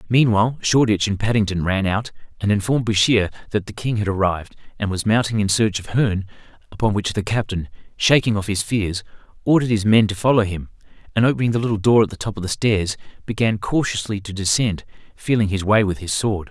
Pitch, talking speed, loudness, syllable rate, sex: 105 Hz, 205 wpm, -20 LUFS, 6.2 syllables/s, male